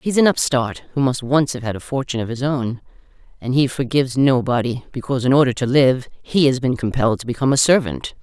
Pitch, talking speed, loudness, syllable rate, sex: 130 Hz, 220 wpm, -19 LUFS, 6.2 syllables/s, female